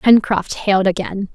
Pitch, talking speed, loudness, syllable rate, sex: 200 Hz, 135 wpm, -17 LUFS, 4.7 syllables/s, female